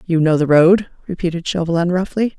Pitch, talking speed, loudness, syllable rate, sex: 175 Hz, 175 wpm, -16 LUFS, 5.6 syllables/s, female